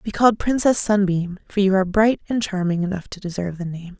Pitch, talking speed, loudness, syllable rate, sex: 195 Hz, 225 wpm, -20 LUFS, 6.1 syllables/s, female